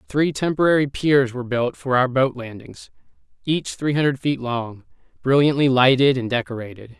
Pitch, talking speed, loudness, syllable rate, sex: 130 Hz, 155 wpm, -20 LUFS, 5.1 syllables/s, male